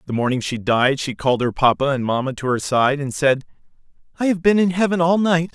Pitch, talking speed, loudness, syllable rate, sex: 145 Hz, 240 wpm, -19 LUFS, 5.8 syllables/s, male